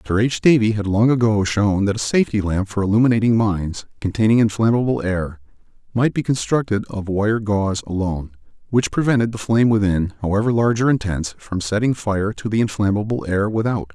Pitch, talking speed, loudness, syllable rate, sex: 105 Hz, 175 wpm, -19 LUFS, 5.9 syllables/s, male